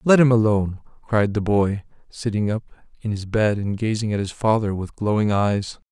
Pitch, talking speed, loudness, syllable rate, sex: 105 Hz, 195 wpm, -21 LUFS, 4.9 syllables/s, male